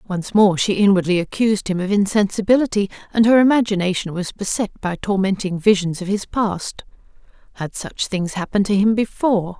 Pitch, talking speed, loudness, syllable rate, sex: 200 Hz, 155 wpm, -19 LUFS, 5.6 syllables/s, female